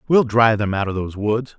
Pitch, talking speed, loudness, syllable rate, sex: 110 Hz, 265 wpm, -19 LUFS, 6.3 syllables/s, male